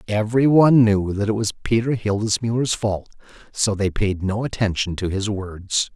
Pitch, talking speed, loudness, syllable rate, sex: 105 Hz, 170 wpm, -20 LUFS, 5.0 syllables/s, male